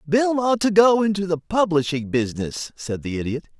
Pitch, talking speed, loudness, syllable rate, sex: 175 Hz, 185 wpm, -21 LUFS, 5.1 syllables/s, male